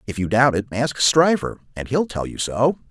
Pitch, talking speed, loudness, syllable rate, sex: 125 Hz, 230 wpm, -20 LUFS, 4.8 syllables/s, male